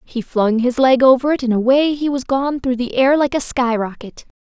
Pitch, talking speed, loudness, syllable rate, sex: 255 Hz, 245 wpm, -16 LUFS, 5.0 syllables/s, female